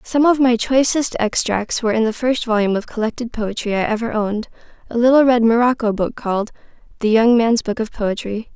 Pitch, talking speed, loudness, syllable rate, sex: 230 Hz, 195 wpm, -18 LUFS, 5.7 syllables/s, female